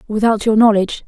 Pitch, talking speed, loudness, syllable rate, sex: 215 Hz, 170 wpm, -14 LUFS, 6.6 syllables/s, female